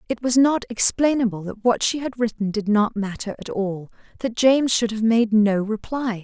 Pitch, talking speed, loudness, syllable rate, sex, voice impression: 225 Hz, 200 wpm, -21 LUFS, 5.0 syllables/s, female, feminine, adult-like, clear, slightly fluent, slightly sincere, friendly, reassuring